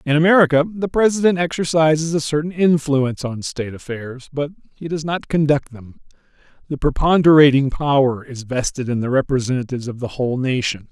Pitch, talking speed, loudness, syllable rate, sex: 145 Hz, 160 wpm, -18 LUFS, 5.7 syllables/s, male